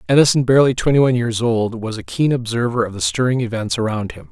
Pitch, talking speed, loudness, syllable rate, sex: 120 Hz, 220 wpm, -17 LUFS, 6.5 syllables/s, male